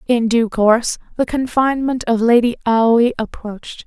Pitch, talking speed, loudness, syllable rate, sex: 235 Hz, 140 wpm, -16 LUFS, 5.0 syllables/s, female